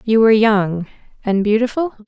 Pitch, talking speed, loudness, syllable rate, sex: 220 Hz, 145 wpm, -16 LUFS, 5.3 syllables/s, female